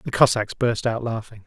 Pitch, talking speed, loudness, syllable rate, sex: 115 Hz, 205 wpm, -22 LUFS, 5.2 syllables/s, male